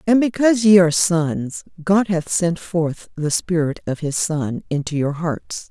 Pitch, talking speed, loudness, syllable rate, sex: 170 Hz, 180 wpm, -19 LUFS, 4.2 syllables/s, female